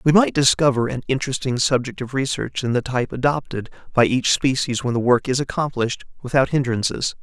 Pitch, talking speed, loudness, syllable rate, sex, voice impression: 130 Hz, 185 wpm, -20 LUFS, 5.9 syllables/s, male, masculine, adult-like, relaxed, slightly bright, muffled, slightly raspy, friendly, reassuring, unique, kind